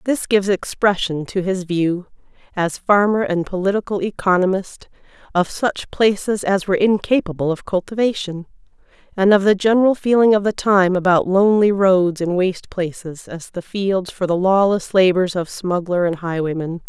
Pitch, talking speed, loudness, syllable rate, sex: 190 Hz, 155 wpm, -18 LUFS, 5.0 syllables/s, female